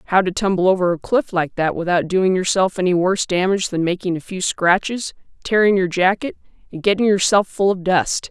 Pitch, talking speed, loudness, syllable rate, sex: 185 Hz, 200 wpm, -18 LUFS, 5.6 syllables/s, female